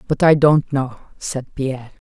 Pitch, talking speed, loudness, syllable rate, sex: 135 Hz, 175 wpm, -18 LUFS, 4.3 syllables/s, female